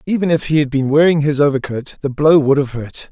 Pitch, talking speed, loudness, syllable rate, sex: 145 Hz, 250 wpm, -15 LUFS, 5.8 syllables/s, male